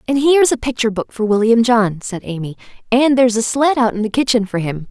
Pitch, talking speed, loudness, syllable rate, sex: 230 Hz, 255 wpm, -16 LUFS, 6.5 syllables/s, female